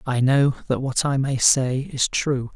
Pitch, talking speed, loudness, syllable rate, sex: 135 Hz, 210 wpm, -21 LUFS, 4.0 syllables/s, male